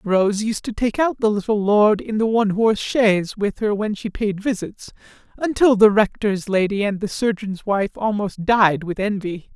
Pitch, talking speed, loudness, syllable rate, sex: 210 Hz, 195 wpm, -19 LUFS, 4.8 syllables/s, male